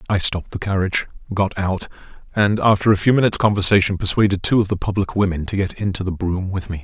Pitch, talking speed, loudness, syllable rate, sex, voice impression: 95 Hz, 220 wpm, -19 LUFS, 6.7 syllables/s, male, very masculine, very adult-like, slightly old, very thick, slightly relaxed, slightly weak, dark, soft, very muffled, fluent, very cool, very intellectual, sincere, very calm, very mature, very friendly, very reassuring, very unique, elegant, very wild, sweet, kind, modest